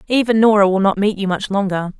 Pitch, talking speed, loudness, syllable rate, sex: 200 Hz, 240 wpm, -16 LUFS, 6.2 syllables/s, female